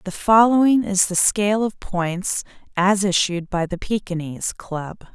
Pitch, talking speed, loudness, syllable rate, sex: 190 Hz, 150 wpm, -20 LUFS, 4.3 syllables/s, female